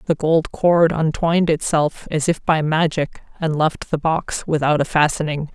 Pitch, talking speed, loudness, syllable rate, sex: 155 Hz, 175 wpm, -19 LUFS, 4.5 syllables/s, female